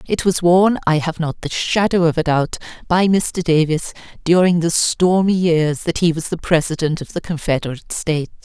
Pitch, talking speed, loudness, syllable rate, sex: 165 Hz, 190 wpm, -17 LUFS, 5.1 syllables/s, female